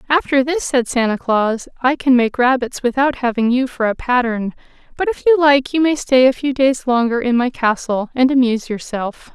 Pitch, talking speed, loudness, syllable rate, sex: 255 Hz, 205 wpm, -16 LUFS, 5.1 syllables/s, female